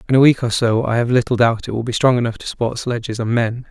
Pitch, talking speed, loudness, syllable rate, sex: 120 Hz, 310 wpm, -17 LUFS, 6.6 syllables/s, male